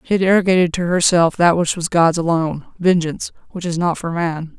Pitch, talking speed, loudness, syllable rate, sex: 170 Hz, 195 wpm, -17 LUFS, 5.9 syllables/s, female